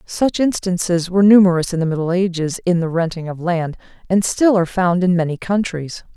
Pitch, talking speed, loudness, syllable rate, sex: 180 Hz, 195 wpm, -17 LUFS, 5.6 syllables/s, female